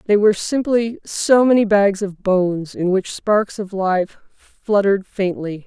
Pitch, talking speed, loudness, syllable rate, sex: 200 Hz, 160 wpm, -18 LUFS, 4.1 syllables/s, female